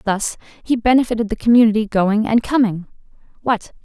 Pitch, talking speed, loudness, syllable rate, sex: 220 Hz, 140 wpm, -17 LUFS, 5.4 syllables/s, female